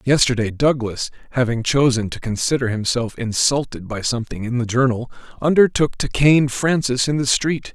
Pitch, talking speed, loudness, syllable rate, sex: 125 Hz, 155 wpm, -19 LUFS, 5.1 syllables/s, male